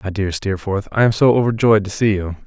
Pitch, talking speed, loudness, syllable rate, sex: 105 Hz, 245 wpm, -17 LUFS, 5.8 syllables/s, male